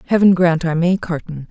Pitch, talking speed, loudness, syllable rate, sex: 170 Hz, 200 wpm, -16 LUFS, 5.4 syllables/s, female